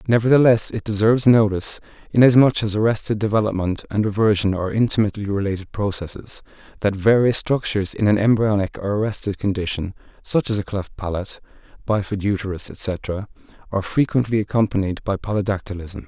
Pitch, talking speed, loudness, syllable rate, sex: 105 Hz, 135 wpm, -20 LUFS, 6.1 syllables/s, male